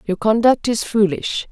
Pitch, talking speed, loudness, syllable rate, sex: 215 Hz, 160 wpm, -17 LUFS, 4.4 syllables/s, female